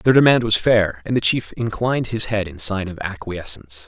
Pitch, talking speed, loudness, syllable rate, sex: 105 Hz, 215 wpm, -19 LUFS, 5.3 syllables/s, male